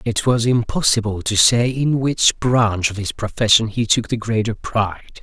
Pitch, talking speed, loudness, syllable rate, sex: 115 Hz, 185 wpm, -18 LUFS, 4.5 syllables/s, male